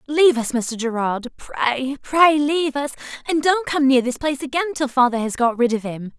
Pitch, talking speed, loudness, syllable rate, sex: 270 Hz, 205 wpm, -20 LUFS, 5.2 syllables/s, female